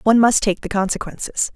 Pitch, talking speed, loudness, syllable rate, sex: 210 Hz, 195 wpm, -19 LUFS, 6.2 syllables/s, female